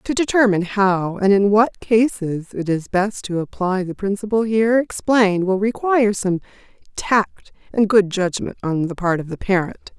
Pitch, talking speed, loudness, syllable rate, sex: 200 Hz, 175 wpm, -19 LUFS, 4.8 syllables/s, female